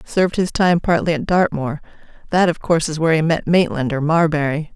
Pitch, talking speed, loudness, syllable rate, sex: 160 Hz, 200 wpm, -18 LUFS, 5.8 syllables/s, female